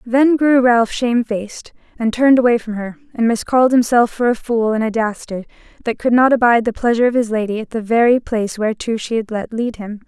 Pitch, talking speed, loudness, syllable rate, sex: 230 Hz, 220 wpm, -16 LUFS, 6.0 syllables/s, female